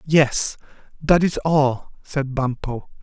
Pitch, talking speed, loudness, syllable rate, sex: 140 Hz, 120 wpm, -21 LUFS, 3.0 syllables/s, male